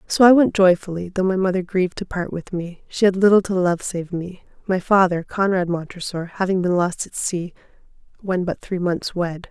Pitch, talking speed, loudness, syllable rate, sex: 185 Hz, 210 wpm, -20 LUFS, 5.1 syllables/s, female